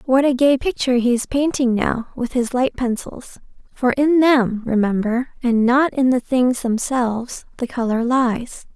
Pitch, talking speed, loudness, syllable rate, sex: 250 Hz, 170 wpm, -18 LUFS, 4.4 syllables/s, female